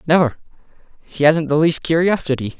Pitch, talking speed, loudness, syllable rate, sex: 155 Hz, 140 wpm, -17 LUFS, 5.6 syllables/s, male